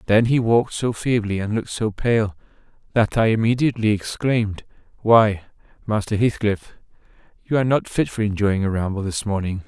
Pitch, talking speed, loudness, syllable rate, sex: 110 Hz, 155 wpm, -21 LUFS, 5.5 syllables/s, male